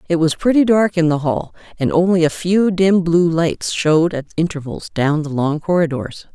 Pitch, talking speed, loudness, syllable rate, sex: 165 Hz, 200 wpm, -17 LUFS, 4.9 syllables/s, female